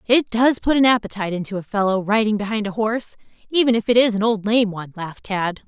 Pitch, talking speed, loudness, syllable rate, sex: 215 Hz, 230 wpm, -19 LUFS, 6.5 syllables/s, female